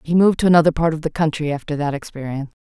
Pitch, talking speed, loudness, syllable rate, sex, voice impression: 155 Hz, 250 wpm, -19 LUFS, 7.8 syllables/s, female, very feminine, adult-like, calm, slightly strict